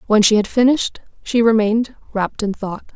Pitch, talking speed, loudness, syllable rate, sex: 220 Hz, 185 wpm, -17 LUFS, 6.0 syllables/s, female